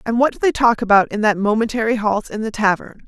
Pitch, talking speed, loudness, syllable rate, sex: 220 Hz, 255 wpm, -17 LUFS, 6.3 syllables/s, female